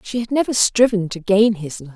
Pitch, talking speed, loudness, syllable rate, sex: 210 Hz, 245 wpm, -17 LUFS, 5.4 syllables/s, female